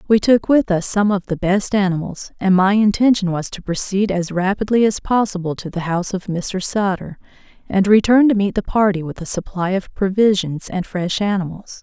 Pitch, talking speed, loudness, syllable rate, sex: 195 Hz, 200 wpm, -18 LUFS, 5.2 syllables/s, female